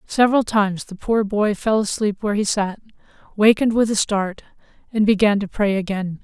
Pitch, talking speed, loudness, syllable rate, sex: 205 Hz, 185 wpm, -19 LUFS, 5.6 syllables/s, female